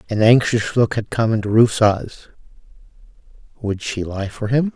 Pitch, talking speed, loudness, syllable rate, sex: 115 Hz, 150 wpm, -18 LUFS, 4.9 syllables/s, male